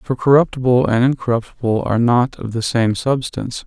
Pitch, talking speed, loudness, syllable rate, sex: 120 Hz, 165 wpm, -17 LUFS, 5.5 syllables/s, male